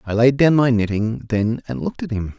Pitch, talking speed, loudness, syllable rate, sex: 115 Hz, 250 wpm, -19 LUFS, 5.6 syllables/s, male